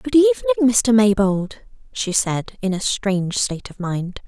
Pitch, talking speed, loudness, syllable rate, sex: 220 Hz, 170 wpm, -19 LUFS, 4.7 syllables/s, female